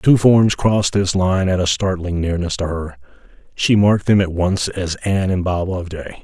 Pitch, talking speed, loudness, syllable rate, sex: 90 Hz, 200 wpm, -17 LUFS, 5.2 syllables/s, male